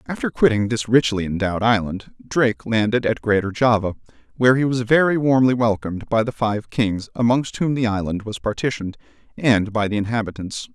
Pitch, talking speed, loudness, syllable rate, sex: 115 Hz, 175 wpm, -20 LUFS, 5.6 syllables/s, male